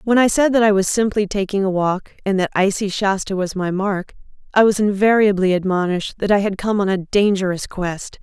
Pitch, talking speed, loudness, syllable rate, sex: 195 Hz, 210 wpm, -18 LUFS, 5.5 syllables/s, female